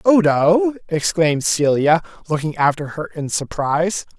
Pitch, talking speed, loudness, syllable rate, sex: 165 Hz, 115 wpm, -18 LUFS, 4.5 syllables/s, male